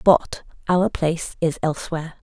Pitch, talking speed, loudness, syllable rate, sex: 165 Hz, 130 wpm, -22 LUFS, 5.2 syllables/s, female